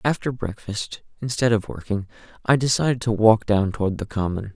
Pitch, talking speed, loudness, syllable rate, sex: 110 Hz, 170 wpm, -22 LUFS, 5.4 syllables/s, male